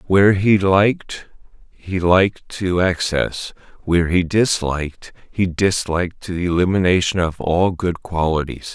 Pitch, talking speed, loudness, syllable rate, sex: 90 Hz, 130 wpm, -18 LUFS, 4.4 syllables/s, male